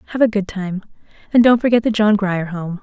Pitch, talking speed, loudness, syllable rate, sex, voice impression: 205 Hz, 235 wpm, -17 LUFS, 5.9 syllables/s, female, feminine, adult-like, tensed, powerful, bright, clear, intellectual, friendly, elegant, lively